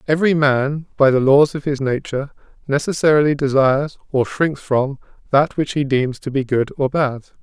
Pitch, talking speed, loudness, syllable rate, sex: 140 Hz, 180 wpm, -18 LUFS, 5.1 syllables/s, male